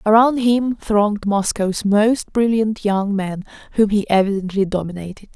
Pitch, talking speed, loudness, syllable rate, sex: 205 Hz, 135 wpm, -18 LUFS, 4.6 syllables/s, female